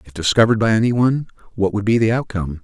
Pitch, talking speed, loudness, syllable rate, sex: 110 Hz, 230 wpm, -17 LUFS, 7.6 syllables/s, male